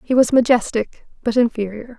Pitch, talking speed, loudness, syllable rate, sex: 235 Hz, 150 wpm, -18 LUFS, 5.2 syllables/s, female